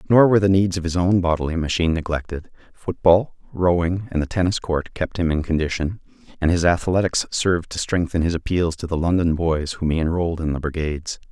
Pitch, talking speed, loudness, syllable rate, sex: 85 Hz, 200 wpm, -21 LUFS, 5.9 syllables/s, male